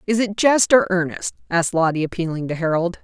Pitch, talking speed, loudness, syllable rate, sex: 180 Hz, 195 wpm, -19 LUFS, 5.9 syllables/s, female